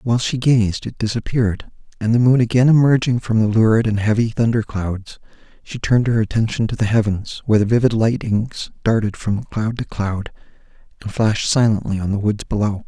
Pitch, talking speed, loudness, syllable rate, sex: 110 Hz, 185 wpm, -18 LUFS, 5.6 syllables/s, male